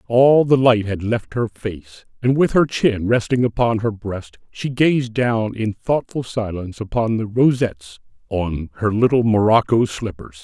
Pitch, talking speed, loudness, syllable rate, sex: 115 Hz, 165 wpm, -19 LUFS, 4.3 syllables/s, male